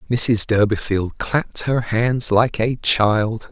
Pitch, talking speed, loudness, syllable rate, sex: 115 Hz, 135 wpm, -18 LUFS, 3.4 syllables/s, male